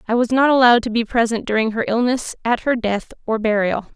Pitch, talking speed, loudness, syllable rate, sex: 230 Hz, 230 wpm, -18 LUFS, 6.0 syllables/s, female